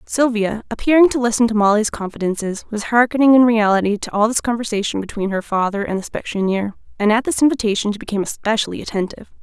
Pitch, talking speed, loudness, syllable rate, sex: 220 Hz, 185 wpm, -18 LUFS, 6.6 syllables/s, female